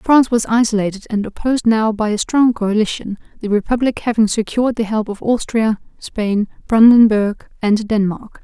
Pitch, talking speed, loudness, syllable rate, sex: 220 Hz, 155 wpm, -16 LUFS, 5.2 syllables/s, female